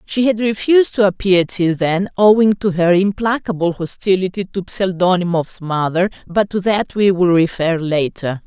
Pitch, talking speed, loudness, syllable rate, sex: 185 Hz, 155 wpm, -16 LUFS, 4.7 syllables/s, female